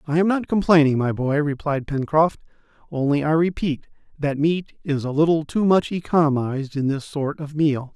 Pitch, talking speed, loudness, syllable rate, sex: 150 Hz, 180 wpm, -21 LUFS, 5.0 syllables/s, male